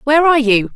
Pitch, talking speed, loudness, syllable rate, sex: 275 Hz, 240 wpm, -12 LUFS, 8.2 syllables/s, female